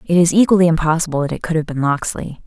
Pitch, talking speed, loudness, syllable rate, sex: 165 Hz, 245 wpm, -16 LUFS, 7.0 syllables/s, female